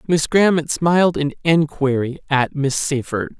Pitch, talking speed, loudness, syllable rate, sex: 150 Hz, 140 wpm, -18 LUFS, 4.3 syllables/s, male